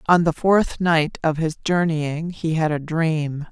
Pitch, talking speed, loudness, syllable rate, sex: 160 Hz, 190 wpm, -21 LUFS, 3.7 syllables/s, female